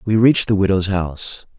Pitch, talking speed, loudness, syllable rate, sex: 100 Hz, 190 wpm, -17 LUFS, 5.8 syllables/s, male